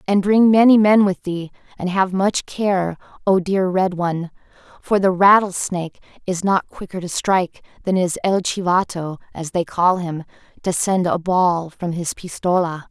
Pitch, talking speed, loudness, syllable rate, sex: 185 Hz, 170 wpm, -19 LUFS, 4.5 syllables/s, female